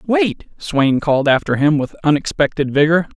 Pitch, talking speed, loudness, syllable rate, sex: 155 Hz, 150 wpm, -16 LUFS, 5.0 syllables/s, male